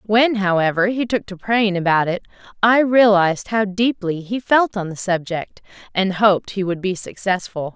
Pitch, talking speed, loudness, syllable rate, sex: 200 Hz, 180 wpm, -18 LUFS, 4.7 syllables/s, female